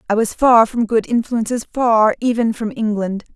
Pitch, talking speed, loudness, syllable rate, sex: 225 Hz, 160 wpm, -17 LUFS, 4.7 syllables/s, female